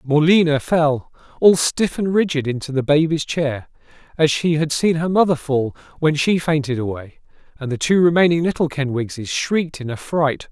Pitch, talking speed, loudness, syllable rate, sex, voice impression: 150 Hz, 170 wpm, -18 LUFS, 5.0 syllables/s, male, very masculine, very adult-like, slightly old, thick, tensed, powerful, bright, hard, slightly clear, fluent, cool, intellectual, slightly refreshing, sincere, very calm, slightly mature, friendly, very reassuring, unique, slightly elegant, wild, slightly sweet, lively, kind, slightly intense